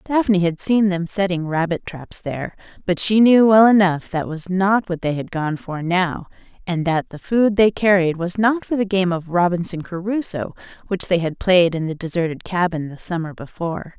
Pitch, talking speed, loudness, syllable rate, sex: 180 Hz, 200 wpm, -19 LUFS, 4.9 syllables/s, female